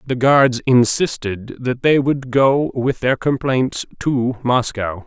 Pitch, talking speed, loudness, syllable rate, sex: 125 Hz, 140 wpm, -17 LUFS, 3.5 syllables/s, male